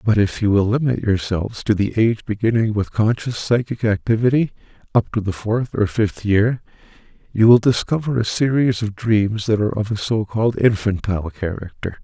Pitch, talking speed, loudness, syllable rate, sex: 110 Hz, 175 wpm, -19 LUFS, 5.3 syllables/s, male